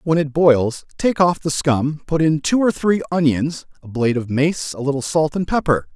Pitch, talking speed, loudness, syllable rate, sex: 150 Hz, 220 wpm, -18 LUFS, 4.9 syllables/s, male